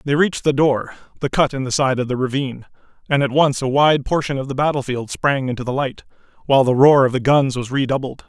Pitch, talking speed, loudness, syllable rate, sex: 135 Hz, 240 wpm, -18 LUFS, 6.1 syllables/s, male